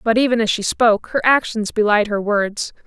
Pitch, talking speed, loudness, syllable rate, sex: 220 Hz, 210 wpm, -17 LUFS, 5.3 syllables/s, female